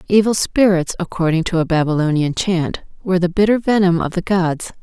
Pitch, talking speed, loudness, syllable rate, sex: 180 Hz, 175 wpm, -17 LUFS, 5.5 syllables/s, female